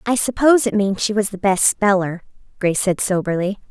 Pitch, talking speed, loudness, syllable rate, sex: 200 Hz, 195 wpm, -18 LUFS, 5.7 syllables/s, female